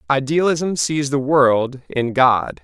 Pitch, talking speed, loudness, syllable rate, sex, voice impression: 135 Hz, 135 wpm, -17 LUFS, 3.4 syllables/s, male, masculine, adult-like, thick, tensed, powerful, slightly bright, clear, raspy, cool, intellectual, calm, slightly mature, wild, lively